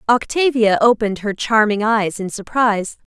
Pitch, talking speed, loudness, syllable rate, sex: 220 Hz, 135 wpm, -17 LUFS, 5.0 syllables/s, female